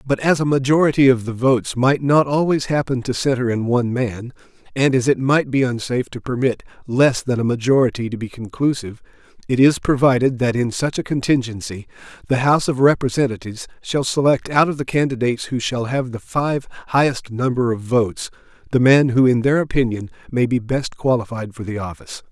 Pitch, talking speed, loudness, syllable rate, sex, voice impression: 125 Hz, 190 wpm, -18 LUFS, 5.6 syllables/s, male, very masculine, very adult-like, very middle-aged, thick, slightly tensed, slightly powerful, slightly bright, soft, slightly clear, fluent, slightly raspy, cool, very intellectual, very sincere, calm, very mature, very friendly, very reassuring, unique, slightly elegant, wild, sweet, slightly lively, very kind